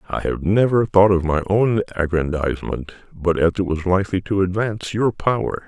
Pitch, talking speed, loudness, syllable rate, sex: 95 Hz, 180 wpm, -19 LUFS, 5.4 syllables/s, male